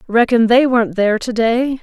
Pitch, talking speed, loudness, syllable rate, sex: 235 Hz, 165 wpm, -14 LUFS, 5.4 syllables/s, female